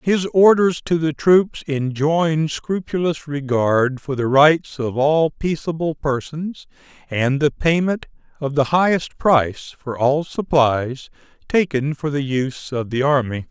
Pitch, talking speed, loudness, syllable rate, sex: 150 Hz, 140 wpm, -19 LUFS, 3.9 syllables/s, male